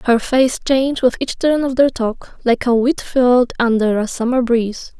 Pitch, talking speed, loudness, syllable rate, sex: 245 Hz, 205 wpm, -16 LUFS, 4.5 syllables/s, female